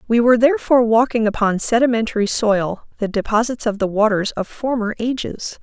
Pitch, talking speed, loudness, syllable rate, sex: 225 Hz, 160 wpm, -18 LUFS, 5.7 syllables/s, female